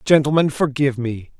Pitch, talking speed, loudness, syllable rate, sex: 135 Hz, 130 wpm, -19 LUFS, 5.6 syllables/s, male